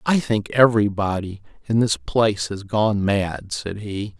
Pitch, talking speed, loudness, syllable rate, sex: 105 Hz, 155 wpm, -21 LUFS, 4.2 syllables/s, male